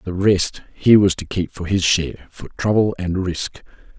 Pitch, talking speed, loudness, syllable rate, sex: 95 Hz, 195 wpm, -19 LUFS, 4.8 syllables/s, male